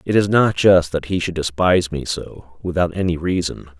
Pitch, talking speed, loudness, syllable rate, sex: 90 Hz, 205 wpm, -18 LUFS, 5.1 syllables/s, male